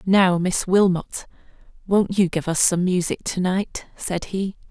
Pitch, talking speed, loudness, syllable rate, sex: 185 Hz, 165 wpm, -21 LUFS, 4.3 syllables/s, female